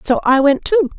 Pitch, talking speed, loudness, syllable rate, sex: 305 Hz, 245 wpm, -14 LUFS, 6.3 syllables/s, female